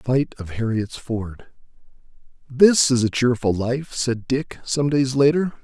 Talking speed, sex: 160 wpm, male